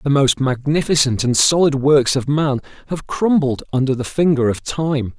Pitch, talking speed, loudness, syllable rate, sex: 140 Hz, 175 wpm, -17 LUFS, 4.7 syllables/s, male